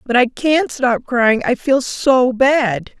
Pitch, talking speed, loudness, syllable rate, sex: 255 Hz, 180 wpm, -15 LUFS, 3.3 syllables/s, female